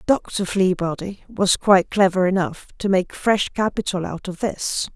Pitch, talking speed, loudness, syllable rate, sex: 190 Hz, 155 wpm, -21 LUFS, 4.4 syllables/s, female